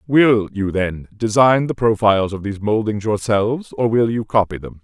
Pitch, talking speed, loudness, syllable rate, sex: 105 Hz, 185 wpm, -18 LUFS, 5.0 syllables/s, male